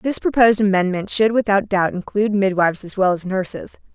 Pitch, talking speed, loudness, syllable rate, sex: 200 Hz, 185 wpm, -18 LUFS, 5.9 syllables/s, female